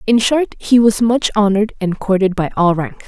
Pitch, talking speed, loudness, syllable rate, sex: 210 Hz, 215 wpm, -15 LUFS, 5.1 syllables/s, female